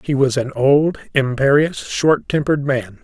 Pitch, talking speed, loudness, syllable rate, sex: 140 Hz, 160 wpm, -17 LUFS, 4.4 syllables/s, male